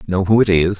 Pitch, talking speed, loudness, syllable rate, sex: 95 Hz, 300 wpm, -15 LUFS, 6.2 syllables/s, male